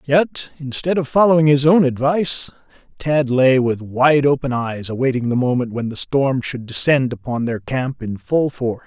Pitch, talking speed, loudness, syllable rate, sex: 135 Hz, 185 wpm, -18 LUFS, 4.7 syllables/s, male